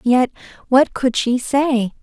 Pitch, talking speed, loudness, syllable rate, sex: 255 Hz, 150 wpm, -17 LUFS, 3.5 syllables/s, female